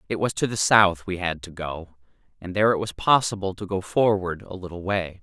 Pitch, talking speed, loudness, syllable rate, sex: 95 Hz, 230 wpm, -23 LUFS, 5.4 syllables/s, male